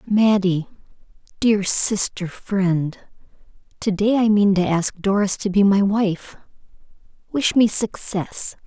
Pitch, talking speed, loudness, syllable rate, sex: 200 Hz, 125 wpm, -19 LUFS, 3.6 syllables/s, female